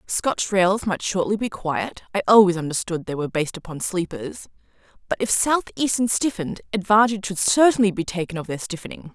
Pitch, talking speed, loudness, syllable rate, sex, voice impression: 195 Hz, 170 wpm, -21 LUFS, 5.9 syllables/s, female, very feminine, very adult-like, very middle-aged, thin, very tensed, very powerful, very bright, very hard, very clear, very fluent, slightly raspy, very cool, very intellectual, very refreshing, sincere, slightly calm, slightly friendly, slightly reassuring, very unique, elegant, wild, slightly sweet, very lively, very strict, very intense, very sharp, slightly light